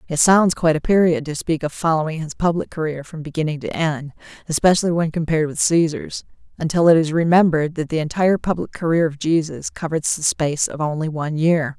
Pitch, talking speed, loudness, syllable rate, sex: 160 Hz, 200 wpm, -19 LUFS, 6.0 syllables/s, female